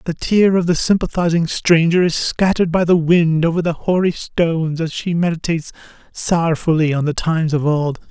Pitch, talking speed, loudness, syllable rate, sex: 165 Hz, 180 wpm, -17 LUFS, 5.3 syllables/s, male